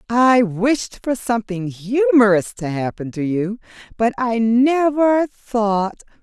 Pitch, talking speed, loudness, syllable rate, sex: 225 Hz, 125 wpm, -18 LUFS, 3.6 syllables/s, female